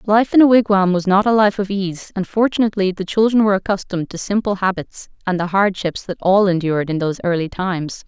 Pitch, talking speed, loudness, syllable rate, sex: 195 Hz, 215 wpm, -17 LUFS, 6.1 syllables/s, female